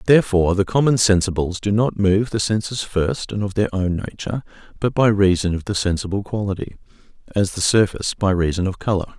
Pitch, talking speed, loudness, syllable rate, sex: 100 Hz, 190 wpm, -20 LUFS, 6.1 syllables/s, male